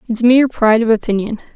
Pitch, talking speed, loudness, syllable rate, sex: 230 Hz, 195 wpm, -14 LUFS, 7.1 syllables/s, female